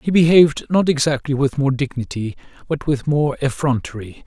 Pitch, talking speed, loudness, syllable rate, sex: 140 Hz, 155 wpm, -18 LUFS, 5.3 syllables/s, male